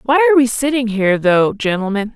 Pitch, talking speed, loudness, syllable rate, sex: 235 Hz, 195 wpm, -15 LUFS, 6.4 syllables/s, female